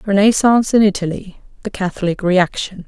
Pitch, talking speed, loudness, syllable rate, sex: 195 Hz, 125 wpm, -16 LUFS, 5.6 syllables/s, female